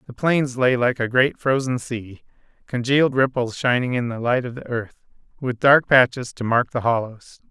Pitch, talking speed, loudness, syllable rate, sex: 125 Hz, 190 wpm, -20 LUFS, 4.9 syllables/s, male